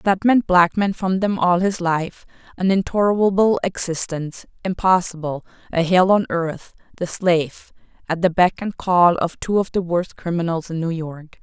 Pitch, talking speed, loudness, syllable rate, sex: 180 Hz, 165 wpm, -19 LUFS, 4.6 syllables/s, female